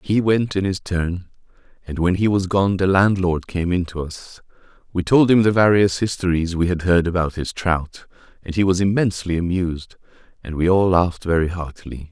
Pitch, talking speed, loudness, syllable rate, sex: 90 Hz, 195 wpm, -19 LUFS, 5.2 syllables/s, male